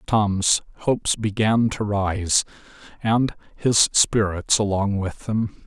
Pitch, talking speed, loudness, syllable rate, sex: 105 Hz, 115 wpm, -21 LUFS, 3.3 syllables/s, male